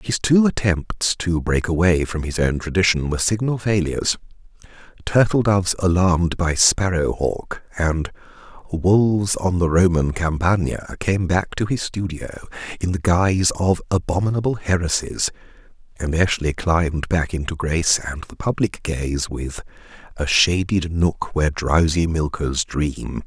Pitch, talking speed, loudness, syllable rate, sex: 85 Hz, 140 wpm, -20 LUFS, 4.5 syllables/s, male